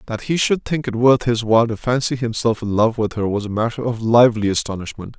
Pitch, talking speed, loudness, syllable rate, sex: 115 Hz, 245 wpm, -18 LUFS, 6.0 syllables/s, male